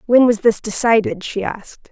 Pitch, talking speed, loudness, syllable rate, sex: 220 Hz, 190 wpm, -17 LUFS, 5.1 syllables/s, female